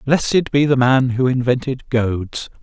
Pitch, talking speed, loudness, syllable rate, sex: 130 Hz, 160 wpm, -17 LUFS, 4.2 syllables/s, male